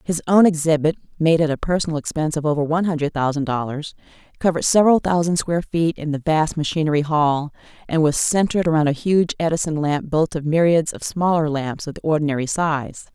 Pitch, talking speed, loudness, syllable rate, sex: 155 Hz, 190 wpm, -19 LUFS, 6.0 syllables/s, female